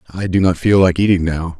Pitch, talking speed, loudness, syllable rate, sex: 90 Hz, 265 wpm, -15 LUFS, 5.8 syllables/s, male